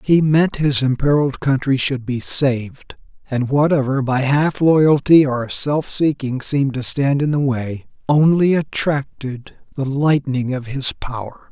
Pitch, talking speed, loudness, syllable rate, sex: 135 Hz, 150 wpm, -18 LUFS, 4.1 syllables/s, male